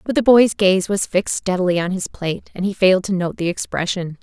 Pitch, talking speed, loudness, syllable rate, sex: 190 Hz, 240 wpm, -18 LUFS, 5.9 syllables/s, female